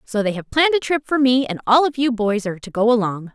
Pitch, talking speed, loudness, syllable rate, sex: 235 Hz, 305 wpm, -18 LUFS, 6.3 syllables/s, female